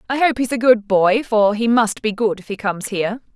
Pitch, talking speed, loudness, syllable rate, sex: 220 Hz, 270 wpm, -18 LUFS, 5.6 syllables/s, female